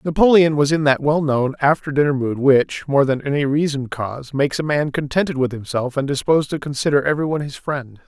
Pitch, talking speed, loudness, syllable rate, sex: 145 Hz, 200 wpm, -19 LUFS, 6.0 syllables/s, male